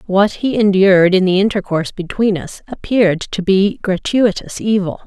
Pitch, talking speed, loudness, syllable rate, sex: 195 Hz, 155 wpm, -15 LUFS, 5.0 syllables/s, female